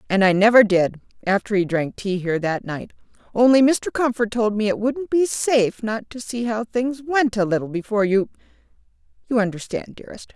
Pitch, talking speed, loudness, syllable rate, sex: 215 Hz, 185 wpm, -20 LUFS, 5.5 syllables/s, female